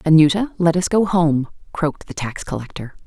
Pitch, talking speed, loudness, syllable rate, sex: 160 Hz, 175 wpm, -19 LUFS, 5.4 syllables/s, female